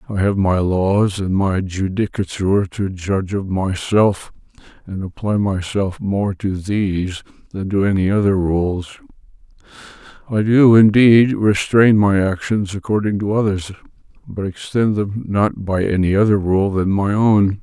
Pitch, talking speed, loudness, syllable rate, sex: 100 Hz, 145 wpm, -17 LUFS, 4.3 syllables/s, male